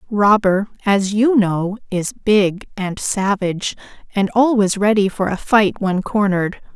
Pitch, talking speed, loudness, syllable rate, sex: 200 Hz, 140 wpm, -17 LUFS, 4.1 syllables/s, female